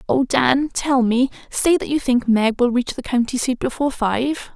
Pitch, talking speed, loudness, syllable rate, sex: 255 Hz, 210 wpm, -19 LUFS, 4.6 syllables/s, female